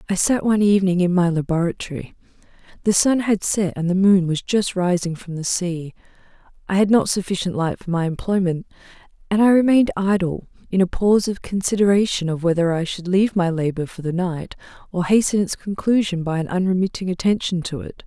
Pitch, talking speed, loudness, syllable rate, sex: 185 Hz, 190 wpm, -20 LUFS, 5.8 syllables/s, female